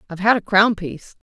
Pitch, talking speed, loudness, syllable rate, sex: 200 Hz, 230 wpm, -17 LUFS, 7.1 syllables/s, female